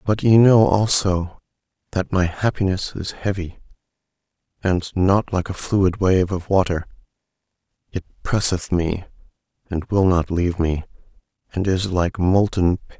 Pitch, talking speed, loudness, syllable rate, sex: 95 Hz, 140 wpm, -20 LUFS, 4.4 syllables/s, male